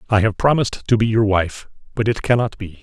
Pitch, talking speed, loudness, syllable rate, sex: 110 Hz, 235 wpm, -18 LUFS, 6.0 syllables/s, male